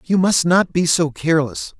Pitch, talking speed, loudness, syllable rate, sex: 170 Hz, 200 wpm, -17 LUFS, 4.8 syllables/s, male